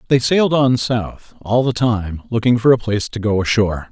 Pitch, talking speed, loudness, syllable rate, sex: 115 Hz, 215 wpm, -17 LUFS, 5.3 syllables/s, male